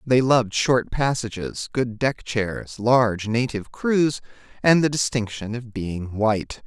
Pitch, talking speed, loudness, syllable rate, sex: 120 Hz, 145 wpm, -22 LUFS, 4.1 syllables/s, male